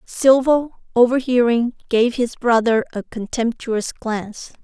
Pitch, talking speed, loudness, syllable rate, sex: 240 Hz, 105 wpm, -18 LUFS, 4.1 syllables/s, female